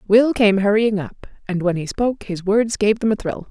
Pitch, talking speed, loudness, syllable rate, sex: 205 Hz, 240 wpm, -19 LUFS, 5.1 syllables/s, female